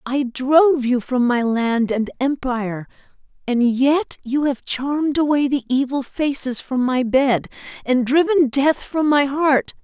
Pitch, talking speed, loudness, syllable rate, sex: 265 Hz, 160 wpm, -19 LUFS, 4.0 syllables/s, female